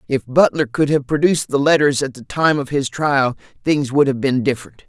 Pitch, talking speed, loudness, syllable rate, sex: 140 Hz, 220 wpm, -17 LUFS, 5.4 syllables/s, male